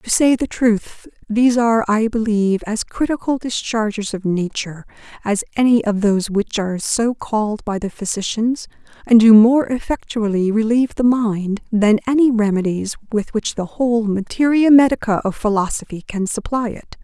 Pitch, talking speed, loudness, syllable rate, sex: 220 Hz, 160 wpm, -17 LUFS, 5.0 syllables/s, female